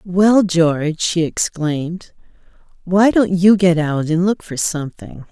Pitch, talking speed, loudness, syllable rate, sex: 175 Hz, 145 wpm, -16 LUFS, 4.0 syllables/s, female